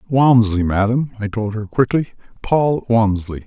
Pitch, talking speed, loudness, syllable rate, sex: 115 Hz, 140 wpm, -17 LUFS, 4.2 syllables/s, male